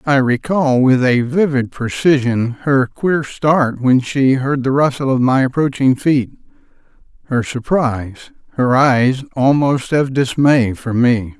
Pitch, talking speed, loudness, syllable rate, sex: 130 Hz, 140 wpm, -15 LUFS, 3.8 syllables/s, male